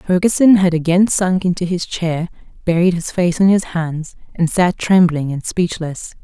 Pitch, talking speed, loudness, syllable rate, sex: 175 Hz, 175 wpm, -16 LUFS, 4.6 syllables/s, female